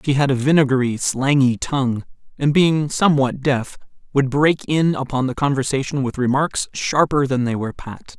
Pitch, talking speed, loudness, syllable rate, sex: 135 Hz, 170 wpm, -19 LUFS, 5.1 syllables/s, male